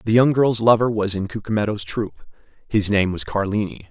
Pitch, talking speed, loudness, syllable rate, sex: 105 Hz, 185 wpm, -20 LUFS, 5.4 syllables/s, male